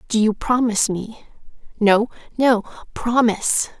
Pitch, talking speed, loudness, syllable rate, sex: 225 Hz, 110 wpm, -19 LUFS, 4.5 syllables/s, female